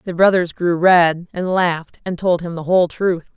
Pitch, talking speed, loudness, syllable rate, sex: 175 Hz, 215 wpm, -17 LUFS, 4.9 syllables/s, female